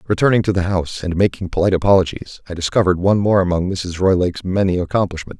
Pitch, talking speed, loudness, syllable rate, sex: 95 Hz, 190 wpm, -17 LUFS, 7.1 syllables/s, male